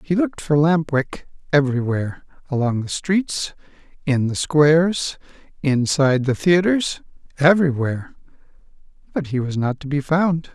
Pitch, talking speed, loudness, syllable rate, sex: 150 Hz, 130 wpm, -20 LUFS, 4.8 syllables/s, male